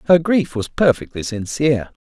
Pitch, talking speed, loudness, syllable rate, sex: 130 Hz, 145 wpm, -18 LUFS, 5.1 syllables/s, male